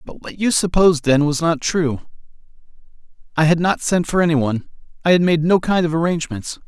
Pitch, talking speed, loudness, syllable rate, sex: 160 Hz, 190 wpm, -18 LUFS, 5.8 syllables/s, male